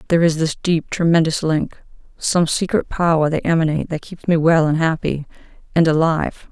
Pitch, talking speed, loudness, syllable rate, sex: 160 Hz, 155 wpm, -18 LUFS, 5.7 syllables/s, female